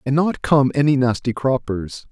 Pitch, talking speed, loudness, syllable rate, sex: 130 Hz, 170 wpm, -19 LUFS, 4.6 syllables/s, male